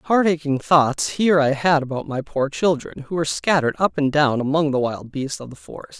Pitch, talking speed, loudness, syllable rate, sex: 145 Hz, 230 wpm, -20 LUFS, 5.4 syllables/s, male